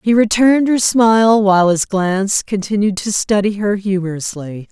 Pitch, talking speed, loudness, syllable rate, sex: 205 Hz, 155 wpm, -14 LUFS, 5.0 syllables/s, female